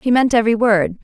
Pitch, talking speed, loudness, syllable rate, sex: 225 Hz, 230 wpm, -15 LUFS, 6.2 syllables/s, female